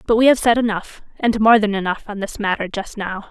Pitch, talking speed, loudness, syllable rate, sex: 210 Hz, 255 wpm, -18 LUFS, 5.8 syllables/s, female